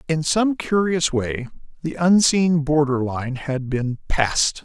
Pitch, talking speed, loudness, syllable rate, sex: 150 Hz, 140 wpm, -20 LUFS, 3.7 syllables/s, male